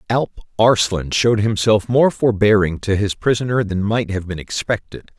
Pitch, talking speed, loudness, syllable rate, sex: 105 Hz, 160 wpm, -18 LUFS, 5.0 syllables/s, male